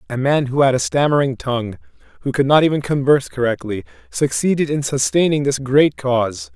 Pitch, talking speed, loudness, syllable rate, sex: 135 Hz, 175 wpm, -18 LUFS, 5.7 syllables/s, male